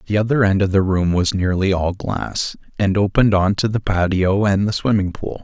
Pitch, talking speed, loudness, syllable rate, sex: 100 Hz, 210 wpm, -18 LUFS, 5.2 syllables/s, male